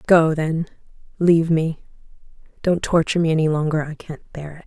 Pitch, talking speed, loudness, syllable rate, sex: 160 Hz, 140 wpm, -20 LUFS, 5.6 syllables/s, female